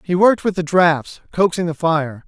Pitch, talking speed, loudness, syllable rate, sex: 170 Hz, 210 wpm, -17 LUFS, 5.3 syllables/s, male